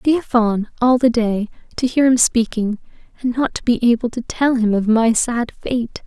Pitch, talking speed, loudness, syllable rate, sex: 235 Hz, 230 wpm, -17 LUFS, 4.8 syllables/s, female